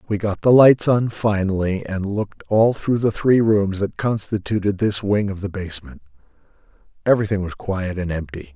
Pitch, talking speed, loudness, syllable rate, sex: 100 Hz, 175 wpm, -19 LUFS, 5.1 syllables/s, male